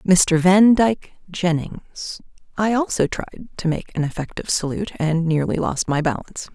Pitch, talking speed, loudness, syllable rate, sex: 180 Hz, 140 wpm, -20 LUFS, 4.7 syllables/s, female